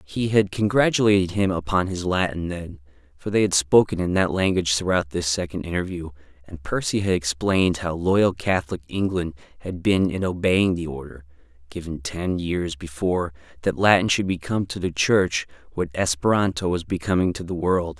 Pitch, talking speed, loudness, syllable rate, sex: 90 Hz, 165 wpm, -22 LUFS, 5.3 syllables/s, male